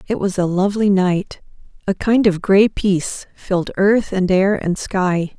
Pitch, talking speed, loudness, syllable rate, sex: 195 Hz, 180 wpm, -17 LUFS, 4.3 syllables/s, female